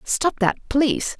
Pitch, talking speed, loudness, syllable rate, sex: 270 Hz, 150 wpm, -21 LUFS, 4.0 syllables/s, female